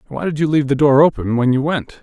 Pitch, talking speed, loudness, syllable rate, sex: 140 Hz, 295 wpm, -16 LUFS, 6.6 syllables/s, male